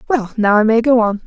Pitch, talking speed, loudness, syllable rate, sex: 225 Hz, 285 wpm, -14 LUFS, 6.1 syllables/s, female